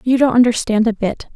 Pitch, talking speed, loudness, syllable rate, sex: 235 Hz, 220 wpm, -15 LUFS, 5.7 syllables/s, female